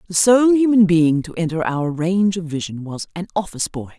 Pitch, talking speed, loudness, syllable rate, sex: 175 Hz, 210 wpm, -18 LUFS, 5.6 syllables/s, female